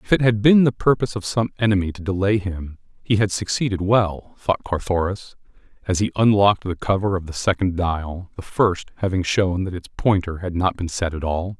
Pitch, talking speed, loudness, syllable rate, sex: 95 Hz, 205 wpm, -21 LUFS, 5.3 syllables/s, male